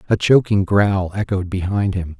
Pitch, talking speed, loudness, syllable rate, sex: 100 Hz, 165 wpm, -18 LUFS, 4.6 syllables/s, male